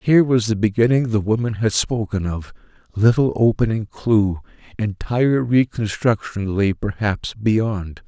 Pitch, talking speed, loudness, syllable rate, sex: 110 Hz, 120 wpm, -19 LUFS, 4.3 syllables/s, male